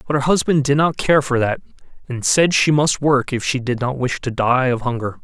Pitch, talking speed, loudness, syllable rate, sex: 135 Hz, 250 wpm, -18 LUFS, 5.2 syllables/s, male